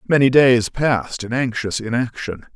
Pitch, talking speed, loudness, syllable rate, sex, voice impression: 120 Hz, 140 wpm, -18 LUFS, 4.8 syllables/s, male, masculine, adult-like, fluent, refreshing, slightly sincere, slightly unique